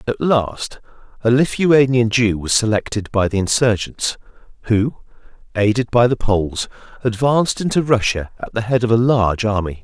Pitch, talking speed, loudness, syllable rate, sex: 115 Hz, 150 wpm, -17 LUFS, 5.0 syllables/s, male